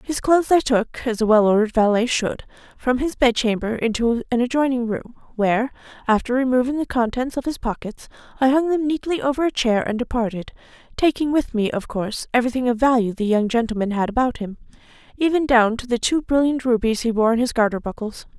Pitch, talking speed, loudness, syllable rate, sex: 245 Hz, 200 wpm, -20 LUFS, 5.9 syllables/s, female